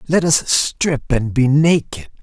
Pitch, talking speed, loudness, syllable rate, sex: 140 Hz, 160 wpm, -16 LUFS, 3.6 syllables/s, male